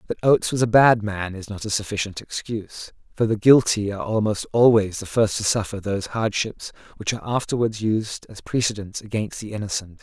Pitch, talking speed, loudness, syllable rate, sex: 105 Hz, 190 wpm, -22 LUFS, 5.6 syllables/s, male